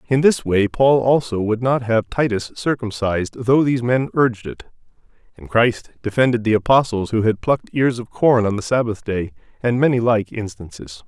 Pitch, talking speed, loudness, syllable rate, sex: 115 Hz, 185 wpm, -18 LUFS, 5.2 syllables/s, male